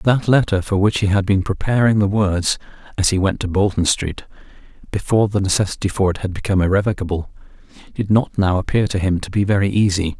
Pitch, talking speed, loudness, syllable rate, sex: 100 Hz, 200 wpm, -18 LUFS, 6.1 syllables/s, male